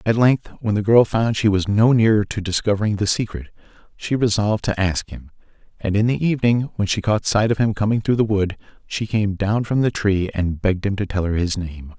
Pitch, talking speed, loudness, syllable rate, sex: 105 Hz, 235 wpm, -20 LUFS, 5.5 syllables/s, male